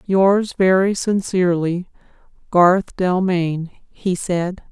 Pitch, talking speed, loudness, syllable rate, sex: 185 Hz, 90 wpm, -18 LUFS, 3.1 syllables/s, female